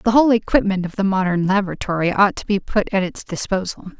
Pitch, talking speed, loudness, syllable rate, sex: 195 Hz, 210 wpm, -19 LUFS, 6.1 syllables/s, female